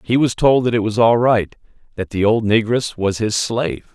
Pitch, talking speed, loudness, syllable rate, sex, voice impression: 110 Hz, 230 wpm, -17 LUFS, 4.9 syllables/s, male, masculine, adult-like, tensed, powerful, bright, clear, cool, calm, mature, friendly, wild, lively, slightly kind